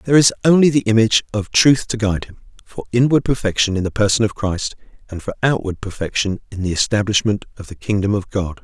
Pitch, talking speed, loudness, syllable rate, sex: 105 Hz, 210 wpm, -18 LUFS, 6.3 syllables/s, male